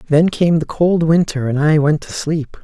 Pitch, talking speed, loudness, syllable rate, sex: 155 Hz, 230 wpm, -16 LUFS, 4.6 syllables/s, male